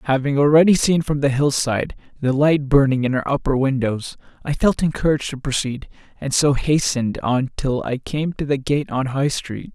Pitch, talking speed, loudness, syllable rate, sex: 140 Hz, 190 wpm, -19 LUFS, 5.2 syllables/s, male